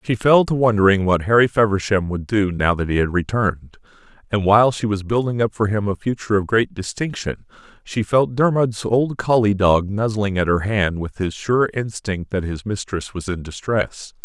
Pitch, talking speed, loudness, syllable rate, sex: 105 Hz, 200 wpm, -19 LUFS, 5.0 syllables/s, male